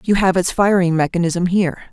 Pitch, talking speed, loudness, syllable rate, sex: 180 Hz, 190 wpm, -17 LUFS, 5.7 syllables/s, female